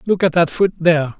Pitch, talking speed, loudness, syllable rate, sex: 170 Hz, 250 wpm, -16 LUFS, 6.2 syllables/s, male